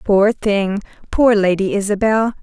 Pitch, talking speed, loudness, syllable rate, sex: 205 Hz, 100 wpm, -16 LUFS, 4.2 syllables/s, female